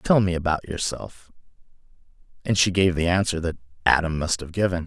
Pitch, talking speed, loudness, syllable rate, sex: 90 Hz, 175 wpm, -23 LUFS, 5.5 syllables/s, male